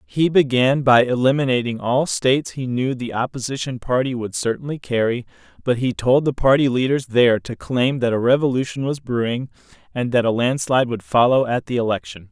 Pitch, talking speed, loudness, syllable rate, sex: 125 Hz, 180 wpm, -19 LUFS, 5.4 syllables/s, male